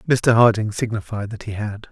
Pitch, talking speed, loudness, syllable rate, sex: 110 Hz, 190 wpm, -20 LUFS, 5.2 syllables/s, male